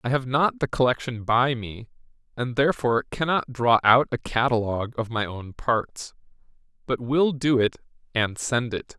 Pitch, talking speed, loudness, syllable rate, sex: 125 Hz, 165 wpm, -24 LUFS, 4.7 syllables/s, male